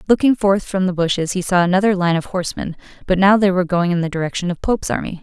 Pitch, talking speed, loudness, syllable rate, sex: 180 Hz, 255 wpm, -17 LUFS, 7.0 syllables/s, female